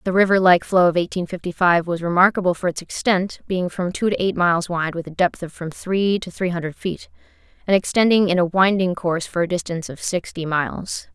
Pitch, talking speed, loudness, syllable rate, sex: 180 Hz, 225 wpm, -20 LUFS, 5.7 syllables/s, female